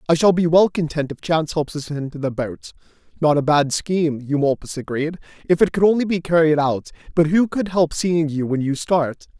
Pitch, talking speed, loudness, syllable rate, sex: 160 Hz, 215 wpm, -19 LUFS, 5.4 syllables/s, male